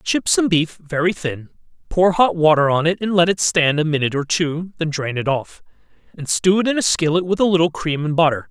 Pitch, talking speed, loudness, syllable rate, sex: 165 Hz, 240 wpm, -18 LUFS, 5.5 syllables/s, male